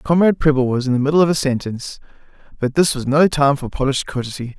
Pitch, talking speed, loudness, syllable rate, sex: 140 Hz, 220 wpm, -17 LUFS, 6.8 syllables/s, male